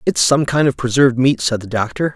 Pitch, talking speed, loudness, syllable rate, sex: 130 Hz, 250 wpm, -16 LUFS, 5.9 syllables/s, male